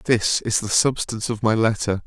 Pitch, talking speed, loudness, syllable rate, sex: 110 Hz, 205 wpm, -21 LUFS, 5.4 syllables/s, male